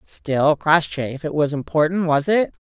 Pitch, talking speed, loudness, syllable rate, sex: 155 Hz, 155 wpm, -19 LUFS, 4.5 syllables/s, female